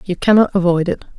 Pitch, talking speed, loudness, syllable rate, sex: 185 Hz, 205 wpm, -15 LUFS, 6.2 syllables/s, female